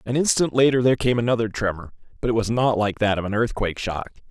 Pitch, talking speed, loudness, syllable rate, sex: 115 Hz, 235 wpm, -22 LUFS, 6.7 syllables/s, male